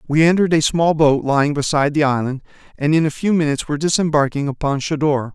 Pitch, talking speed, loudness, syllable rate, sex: 150 Hz, 200 wpm, -17 LUFS, 6.6 syllables/s, male